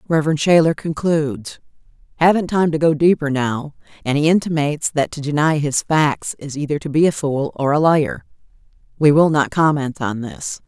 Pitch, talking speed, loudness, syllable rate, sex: 150 Hz, 180 wpm, -18 LUFS, 5.1 syllables/s, female